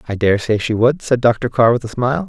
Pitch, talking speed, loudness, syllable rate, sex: 120 Hz, 290 wpm, -16 LUFS, 5.7 syllables/s, male